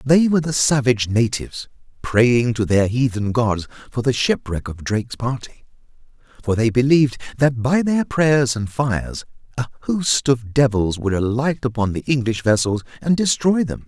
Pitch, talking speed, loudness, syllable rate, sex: 125 Hz, 165 wpm, -19 LUFS, 4.9 syllables/s, male